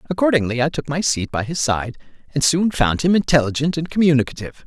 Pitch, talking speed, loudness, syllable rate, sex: 145 Hz, 195 wpm, -19 LUFS, 6.4 syllables/s, male